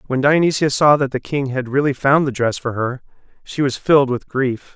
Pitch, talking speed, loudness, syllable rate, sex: 135 Hz, 225 wpm, -17 LUFS, 5.3 syllables/s, male